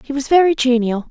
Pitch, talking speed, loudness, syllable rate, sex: 265 Hz, 220 wpm, -15 LUFS, 6.1 syllables/s, female